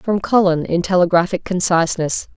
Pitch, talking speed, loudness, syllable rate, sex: 180 Hz, 125 wpm, -17 LUFS, 5.3 syllables/s, female